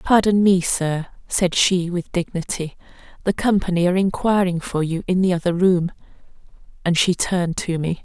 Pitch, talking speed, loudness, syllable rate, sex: 180 Hz, 155 wpm, -20 LUFS, 5.0 syllables/s, female